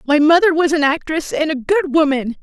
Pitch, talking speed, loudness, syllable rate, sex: 305 Hz, 220 wpm, -15 LUFS, 5.3 syllables/s, female